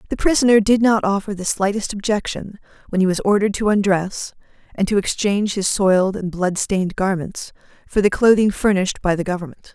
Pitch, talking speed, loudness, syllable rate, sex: 200 Hz, 180 wpm, -18 LUFS, 5.8 syllables/s, female